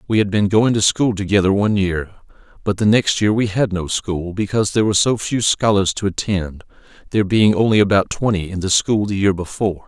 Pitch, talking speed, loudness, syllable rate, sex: 100 Hz, 220 wpm, -17 LUFS, 5.8 syllables/s, male